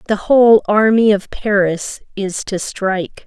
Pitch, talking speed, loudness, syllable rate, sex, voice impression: 205 Hz, 145 wpm, -15 LUFS, 4.1 syllables/s, female, feminine, young, tensed, bright, soft, clear, halting, calm, friendly, slightly sweet, lively